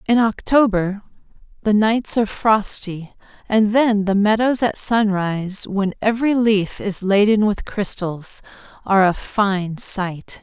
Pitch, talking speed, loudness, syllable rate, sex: 205 Hz, 130 wpm, -18 LUFS, 4.0 syllables/s, female